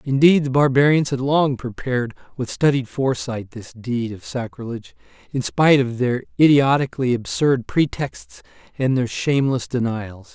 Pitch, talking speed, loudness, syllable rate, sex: 130 Hz, 140 wpm, -20 LUFS, 4.9 syllables/s, male